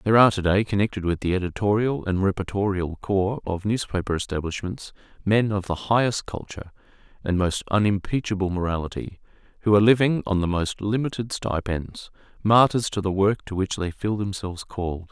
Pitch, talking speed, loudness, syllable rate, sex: 100 Hz, 165 wpm, -24 LUFS, 5.6 syllables/s, male